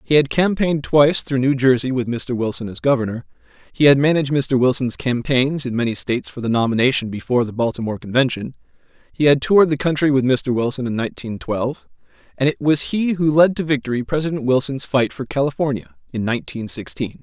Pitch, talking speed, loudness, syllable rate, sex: 135 Hz, 190 wpm, -19 LUFS, 6.1 syllables/s, male